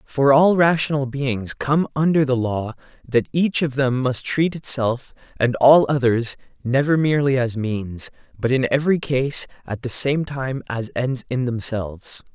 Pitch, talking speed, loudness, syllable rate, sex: 130 Hz, 165 wpm, -20 LUFS, 4.3 syllables/s, male